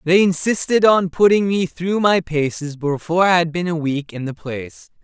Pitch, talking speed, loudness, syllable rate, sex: 165 Hz, 205 wpm, -18 LUFS, 5.0 syllables/s, male